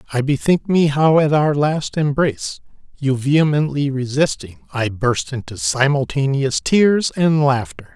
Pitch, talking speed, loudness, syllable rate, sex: 140 Hz, 135 wpm, -17 LUFS, 4.3 syllables/s, male